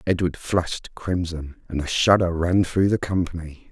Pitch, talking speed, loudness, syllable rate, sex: 85 Hz, 160 wpm, -23 LUFS, 4.5 syllables/s, male